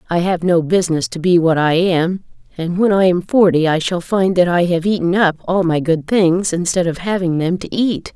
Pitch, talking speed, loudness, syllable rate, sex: 175 Hz, 235 wpm, -16 LUFS, 5.0 syllables/s, female